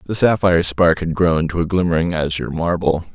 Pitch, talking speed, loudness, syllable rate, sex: 85 Hz, 190 wpm, -17 LUFS, 5.8 syllables/s, male